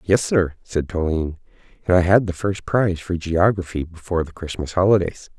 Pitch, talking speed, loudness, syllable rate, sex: 90 Hz, 180 wpm, -21 LUFS, 5.6 syllables/s, male